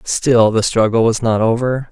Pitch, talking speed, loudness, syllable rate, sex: 115 Hz, 190 wpm, -14 LUFS, 4.4 syllables/s, male